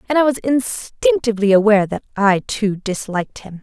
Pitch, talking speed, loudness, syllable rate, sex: 225 Hz, 165 wpm, -17 LUFS, 5.4 syllables/s, female